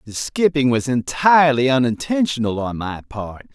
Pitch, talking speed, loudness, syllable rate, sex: 130 Hz, 135 wpm, -18 LUFS, 5.0 syllables/s, male